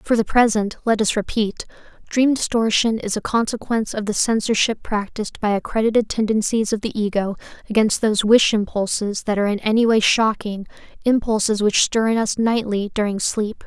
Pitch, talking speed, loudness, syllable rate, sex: 215 Hz, 170 wpm, -19 LUFS, 5.4 syllables/s, female